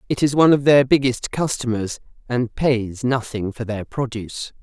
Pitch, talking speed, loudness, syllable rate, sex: 125 Hz, 170 wpm, -20 LUFS, 4.9 syllables/s, female